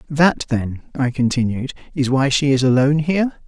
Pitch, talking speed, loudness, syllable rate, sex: 140 Hz, 175 wpm, -18 LUFS, 5.2 syllables/s, male